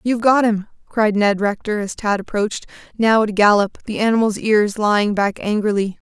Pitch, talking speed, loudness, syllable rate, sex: 210 Hz, 190 wpm, -18 LUFS, 5.4 syllables/s, female